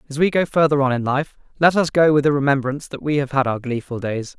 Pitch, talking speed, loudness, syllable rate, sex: 140 Hz, 275 wpm, -19 LUFS, 6.3 syllables/s, male